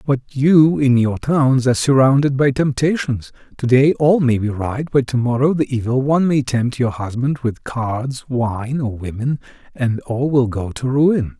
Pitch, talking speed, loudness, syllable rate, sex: 130 Hz, 180 wpm, -17 LUFS, 4.4 syllables/s, male